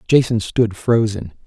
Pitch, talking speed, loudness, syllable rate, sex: 110 Hz, 125 wpm, -18 LUFS, 4.1 syllables/s, male